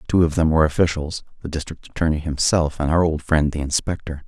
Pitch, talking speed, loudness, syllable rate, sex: 80 Hz, 195 wpm, -21 LUFS, 6.2 syllables/s, male